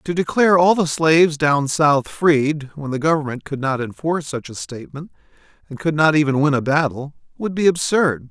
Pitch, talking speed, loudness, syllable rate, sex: 150 Hz, 195 wpm, -18 LUFS, 5.3 syllables/s, male